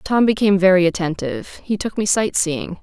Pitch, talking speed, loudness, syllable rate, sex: 190 Hz, 170 wpm, -18 LUFS, 5.6 syllables/s, female